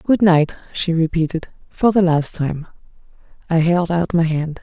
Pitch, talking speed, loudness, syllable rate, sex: 170 Hz, 170 wpm, -18 LUFS, 4.4 syllables/s, female